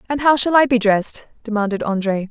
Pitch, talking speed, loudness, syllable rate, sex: 230 Hz, 210 wpm, -17 LUFS, 6.1 syllables/s, female